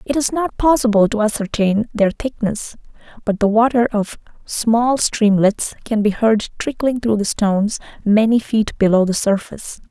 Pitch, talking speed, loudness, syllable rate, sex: 220 Hz, 155 wpm, -17 LUFS, 4.6 syllables/s, female